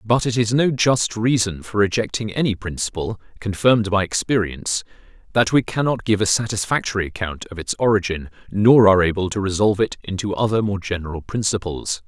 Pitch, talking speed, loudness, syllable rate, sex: 105 Hz, 170 wpm, -20 LUFS, 5.7 syllables/s, male